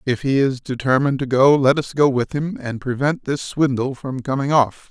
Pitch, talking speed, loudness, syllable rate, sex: 135 Hz, 220 wpm, -19 LUFS, 5.0 syllables/s, male